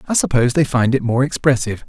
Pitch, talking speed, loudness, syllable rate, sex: 130 Hz, 225 wpm, -17 LUFS, 7.0 syllables/s, male